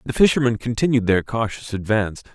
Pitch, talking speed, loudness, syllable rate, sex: 115 Hz, 155 wpm, -20 LUFS, 6.1 syllables/s, male